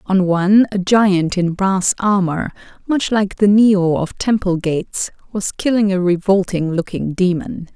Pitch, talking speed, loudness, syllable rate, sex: 190 Hz, 155 wpm, -16 LUFS, 4.2 syllables/s, female